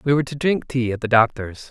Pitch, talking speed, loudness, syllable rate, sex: 125 Hz, 280 wpm, -20 LUFS, 6.2 syllables/s, male